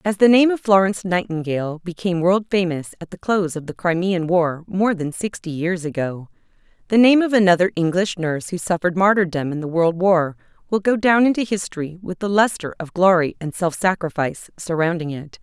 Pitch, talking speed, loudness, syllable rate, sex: 180 Hz, 190 wpm, -19 LUFS, 5.6 syllables/s, female